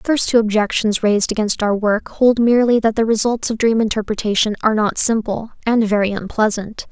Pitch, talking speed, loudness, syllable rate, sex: 220 Hz, 190 wpm, -17 LUFS, 5.7 syllables/s, female